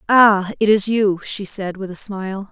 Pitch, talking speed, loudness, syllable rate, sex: 200 Hz, 215 wpm, -18 LUFS, 4.5 syllables/s, female